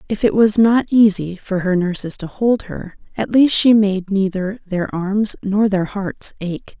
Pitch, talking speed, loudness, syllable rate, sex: 200 Hz, 195 wpm, -17 LUFS, 4.0 syllables/s, female